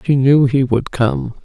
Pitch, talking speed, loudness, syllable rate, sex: 130 Hz, 210 wpm, -15 LUFS, 4.0 syllables/s, female